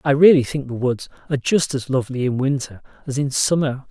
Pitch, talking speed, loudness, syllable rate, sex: 135 Hz, 215 wpm, -20 LUFS, 6.0 syllables/s, male